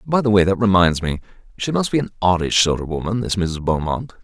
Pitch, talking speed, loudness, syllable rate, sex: 100 Hz, 240 wpm, -19 LUFS, 5.9 syllables/s, male